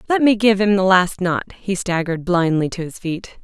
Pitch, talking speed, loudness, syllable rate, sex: 190 Hz, 225 wpm, -18 LUFS, 5.1 syllables/s, female